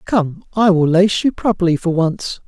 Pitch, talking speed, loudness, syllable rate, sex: 180 Hz, 195 wpm, -16 LUFS, 4.5 syllables/s, male